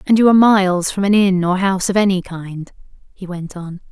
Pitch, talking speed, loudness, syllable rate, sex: 190 Hz, 230 wpm, -15 LUFS, 5.7 syllables/s, female